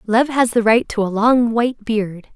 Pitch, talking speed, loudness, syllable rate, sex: 225 Hz, 230 wpm, -17 LUFS, 4.5 syllables/s, female